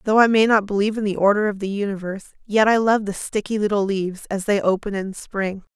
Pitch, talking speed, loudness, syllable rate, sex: 205 Hz, 240 wpm, -20 LUFS, 6.3 syllables/s, female